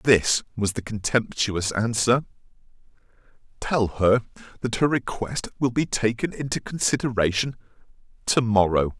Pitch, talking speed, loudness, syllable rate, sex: 115 Hz, 115 wpm, -24 LUFS, 4.5 syllables/s, male